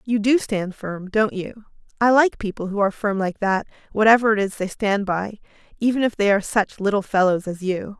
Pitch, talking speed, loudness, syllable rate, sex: 205 Hz, 220 wpm, -21 LUFS, 5.4 syllables/s, female